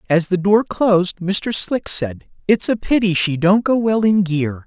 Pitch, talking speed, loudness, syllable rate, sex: 190 Hz, 205 wpm, -17 LUFS, 4.2 syllables/s, male